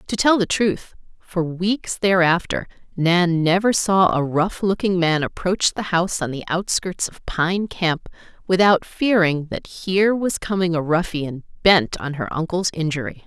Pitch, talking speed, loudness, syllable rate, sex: 175 Hz, 165 wpm, -20 LUFS, 4.3 syllables/s, female